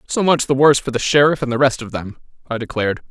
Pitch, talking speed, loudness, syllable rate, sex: 130 Hz, 270 wpm, -17 LUFS, 6.9 syllables/s, male